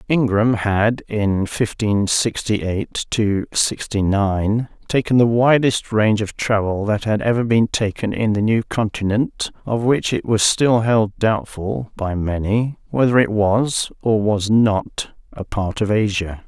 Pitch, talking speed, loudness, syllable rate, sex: 110 Hz, 155 wpm, -19 LUFS, 3.8 syllables/s, male